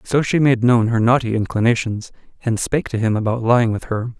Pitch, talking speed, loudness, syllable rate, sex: 115 Hz, 215 wpm, -18 LUFS, 5.9 syllables/s, male